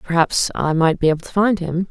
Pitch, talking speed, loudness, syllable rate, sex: 175 Hz, 250 wpm, -18 LUFS, 5.6 syllables/s, female